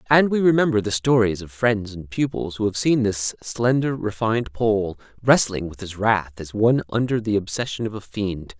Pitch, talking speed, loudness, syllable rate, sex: 110 Hz, 195 wpm, -22 LUFS, 5.0 syllables/s, male